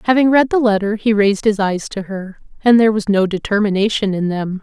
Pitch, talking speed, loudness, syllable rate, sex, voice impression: 210 Hz, 220 wpm, -16 LUFS, 5.9 syllables/s, female, very feminine, adult-like, slightly middle-aged, very thin, tensed, slightly powerful, very bright, slightly soft, very clear, fluent, slightly nasal, cute, intellectual, refreshing, sincere, calm, friendly, reassuring, very unique, elegant, sweet, slightly lively, kind, slightly intense, light